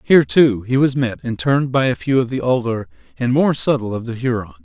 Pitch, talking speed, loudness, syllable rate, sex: 120 Hz, 245 wpm, -18 LUFS, 5.7 syllables/s, male